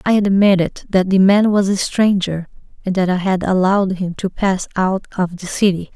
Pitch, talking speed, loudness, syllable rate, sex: 190 Hz, 200 wpm, -16 LUFS, 5.0 syllables/s, female